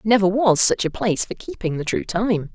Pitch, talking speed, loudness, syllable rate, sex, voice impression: 200 Hz, 235 wpm, -20 LUFS, 5.3 syllables/s, female, feminine, adult-like, slightly relaxed, powerful, slightly muffled, raspy, intellectual, slightly friendly, slightly unique, lively, slightly strict, slightly sharp